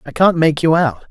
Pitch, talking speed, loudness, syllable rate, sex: 155 Hz, 270 wpm, -14 LUFS, 5.4 syllables/s, male